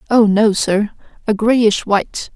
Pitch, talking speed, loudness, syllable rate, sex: 215 Hz, 155 wpm, -15 LUFS, 3.9 syllables/s, female